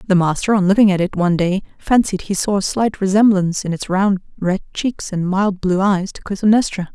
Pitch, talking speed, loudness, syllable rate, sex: 190 Hz, 215 wpm, -17 LUFS, 5.5 syllables/s, female